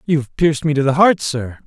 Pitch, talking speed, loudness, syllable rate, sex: 145 Hz, 250 wpm, -16 LUFS, 6.0 syllables/s, male